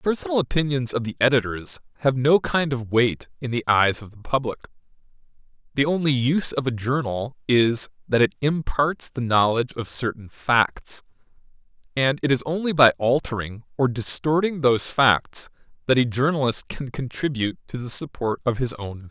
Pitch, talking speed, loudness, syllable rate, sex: 130 Hz, 170 wpm, -22 LUFS, 5.1 syllables/s, male